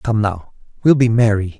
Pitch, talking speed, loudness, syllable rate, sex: 110 Hz, 190 wpm, -16 LUFS, 4.8 syllables/s, male